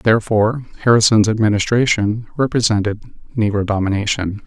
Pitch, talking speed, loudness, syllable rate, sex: 110 Hz, 80 wpm, -16 LUFS, 5.9 syllables/s, male